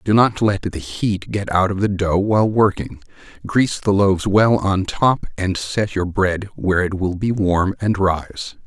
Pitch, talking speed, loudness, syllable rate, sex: 100 Hz, 200 wpm, -18 LUFS, 4.4 syllables/s, male